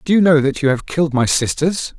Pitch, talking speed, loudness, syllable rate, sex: 150 Hz, 270 wpm, -16 LUFS, 5.9 syllables/s, male